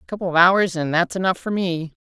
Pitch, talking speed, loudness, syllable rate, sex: 180 Hz, 265 wpm, -19 LUFS, 6.0 syllables/s, female